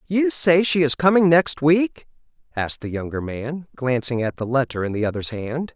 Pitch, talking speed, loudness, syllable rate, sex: 145 Hz, 200 wpm, -21 LUFS, 4.9 syllables/s, male